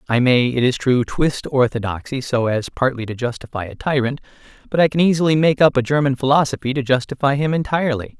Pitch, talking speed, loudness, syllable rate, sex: 130 Hz, 200 wpm, -18 LUFS, 6.0 syllables/s, male